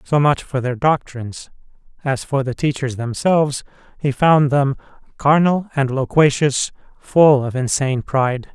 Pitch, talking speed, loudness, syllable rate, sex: 140 Hz, 140 wpm, -18 LUFS, 4.6 syllables/s, male